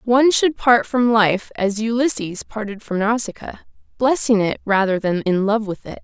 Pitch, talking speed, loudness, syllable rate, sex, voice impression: 220 Hz, 170 wpm, -19 LUFS, 4.7 syllables/s, female, feminine, slightly adult-like, slightly sincere, friendly, slightly sweet